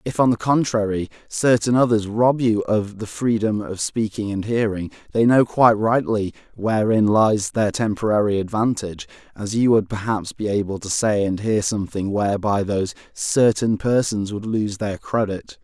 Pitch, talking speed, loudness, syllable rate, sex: 105 Hz, 165 wpm, -20 LUFS, 4.8 syllables/s, male